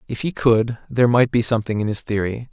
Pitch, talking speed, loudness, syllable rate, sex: 115 Hz, 240 wpm, -20 LUFS, 6.3 syllables/s, male